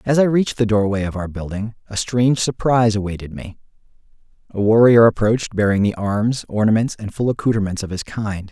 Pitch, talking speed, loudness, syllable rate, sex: 110 Hz, 185 wpm, -18 LUFS, 5.9 syllables/s, male